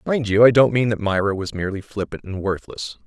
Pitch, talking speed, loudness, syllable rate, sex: 105 Hz, 235 wpm, -20 LUFS, 5.9 syllables/s, male